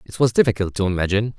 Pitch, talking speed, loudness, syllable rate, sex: 105 Hz, 215 wpm, -20 LUFS, 7.9 syllables/s, male